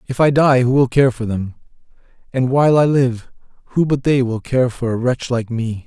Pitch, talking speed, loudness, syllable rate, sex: 125 Hz, 225 wpm, -17 LUFS, 5.1 syllables/s, male